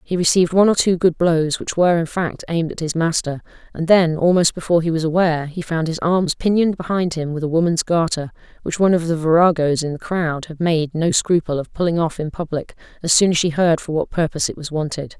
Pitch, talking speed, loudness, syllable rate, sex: 165 Hz, 240 wpm, -18 LUFS, 6.1 syllables/s, female